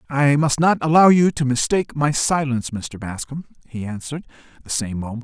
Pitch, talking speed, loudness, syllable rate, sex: 135 Hz, 185 wpm, -19 LUFS, 5.9 syllables/s, male